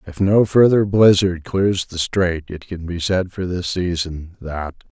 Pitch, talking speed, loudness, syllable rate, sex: 90 Hz, 180 wpm, -18 LUFS, 4.0 syllables/s, male